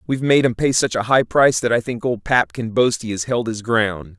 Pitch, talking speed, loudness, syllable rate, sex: 120 Hz, 285 wpm, -18 LUFS, 5.5 syllables/s, male